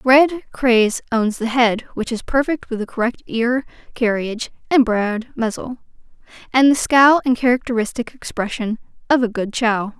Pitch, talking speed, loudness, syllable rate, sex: 240 Hz, 155 wpm, -18 LUFS, 4.8 syllables/s, female